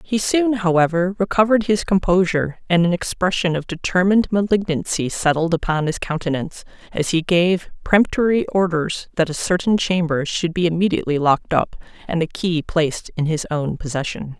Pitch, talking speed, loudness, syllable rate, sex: 175 Hz, 160 wpm, -19 LUFS, 5.5 syllables/s, female